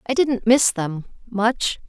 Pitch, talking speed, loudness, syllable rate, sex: 225 Hz, 130 wpm, -20 LUFS, 3.7 syllables/s, female